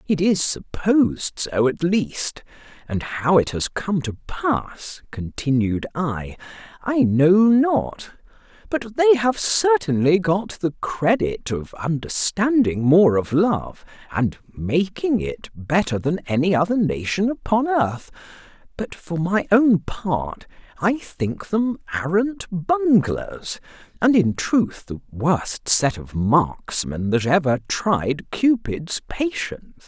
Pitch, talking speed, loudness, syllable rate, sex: 170 Hz, 125 wpm, -21 LUFS, 3.4 syllables/s, male